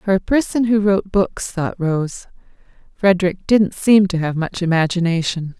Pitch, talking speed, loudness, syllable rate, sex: 185 Hz, 160 wpm, -18 LUFS, 4.8 syllables/s, female